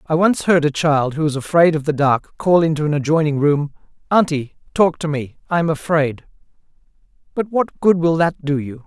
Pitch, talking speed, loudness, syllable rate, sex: 155 Hz, 205 wpm, -18 LUFS, 5.2 syllables/s, male